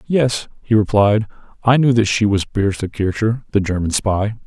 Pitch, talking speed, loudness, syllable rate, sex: 105 Hz, 175 wpm, -17 LUFS, 4.6 syllables/s, male